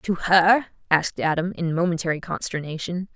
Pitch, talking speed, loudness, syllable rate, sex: 175 Hz, 135 wpm, -22 LUFS, 5.2 syllables/s, female